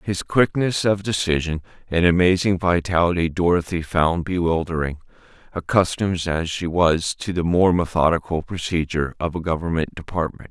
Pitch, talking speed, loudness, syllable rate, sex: 85 Hz, 130 wpm, -21 LUFS, 5.1 syllables/s, male